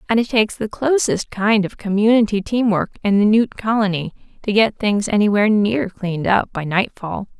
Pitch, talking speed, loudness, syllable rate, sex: 210 Hz, 185 wpm, -18 LUFS, 5.2 syllables/s, female